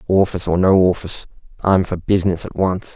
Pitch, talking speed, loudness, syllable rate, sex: 90 Hz, 180 wpm, -18 LUFS, 5.6 syllables/s, male